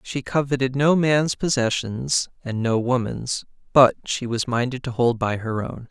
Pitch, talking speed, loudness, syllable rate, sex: 125 Hz, 160 wpm, -22 LUFS, 4.4 syllables/s, male